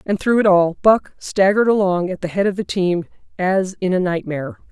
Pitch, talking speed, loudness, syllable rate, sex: 190 Hz, 215 wpm, -18 LUFS, 5.4 syllables/s, female